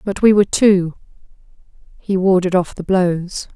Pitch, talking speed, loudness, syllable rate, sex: 185 Hz, 150 wpm, -16 LUFS, 4.6 syllables/s, female